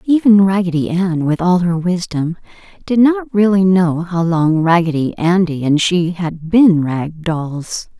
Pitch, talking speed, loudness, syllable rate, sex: 175 Hz, 160 wpm, -15 LUFS, 4.0 syllables/s, female